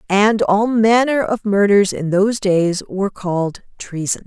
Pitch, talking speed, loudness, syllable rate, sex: 200 Hz, 155 wpm, -16 LUFS, 4.4 syllables/s, female